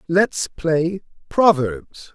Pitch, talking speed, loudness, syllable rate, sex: 165 Hz, 85 wpm, -19 LUFS, 2.5 syllables/s, male